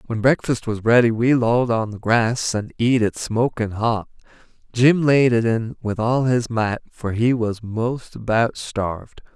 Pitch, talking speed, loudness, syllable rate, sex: 115 Hz, 180 wpm, -20 LUFS, 4.1 syllables/s, male